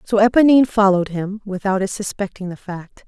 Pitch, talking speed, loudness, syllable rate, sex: 200 Hz, 175 wpm, -17 LUFS, 5.8 syllables/s, female